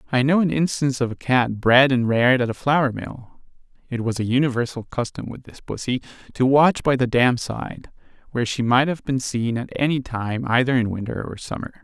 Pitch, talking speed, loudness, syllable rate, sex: 125 Hz, 215 wpm, -21 LUFS, 5.4 syllables/s, male